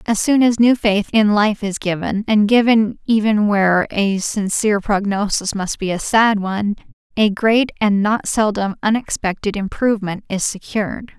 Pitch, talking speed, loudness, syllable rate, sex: 210 Hz, 160 wpm, -17 LUFS, 4.7 syllables/s, female